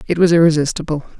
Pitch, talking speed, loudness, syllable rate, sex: 160 Hz, 150 wpm, -15 LUFS, 7.3 syllables/s, female